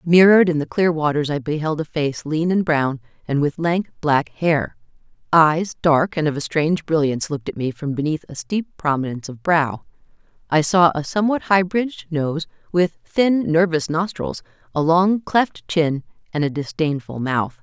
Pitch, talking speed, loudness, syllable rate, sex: 160 Hz, 180 wpm, -20 LUFS, 4.9 syllables/s, female